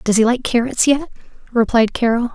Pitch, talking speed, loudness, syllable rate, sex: 240 Hz, 180 wpm, -17 LUFS, 5.3 syllables/s, female